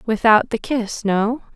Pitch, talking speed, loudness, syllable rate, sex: 220 Hz, 155 wpm, -18 LUFS, 3.8 syllables/s, female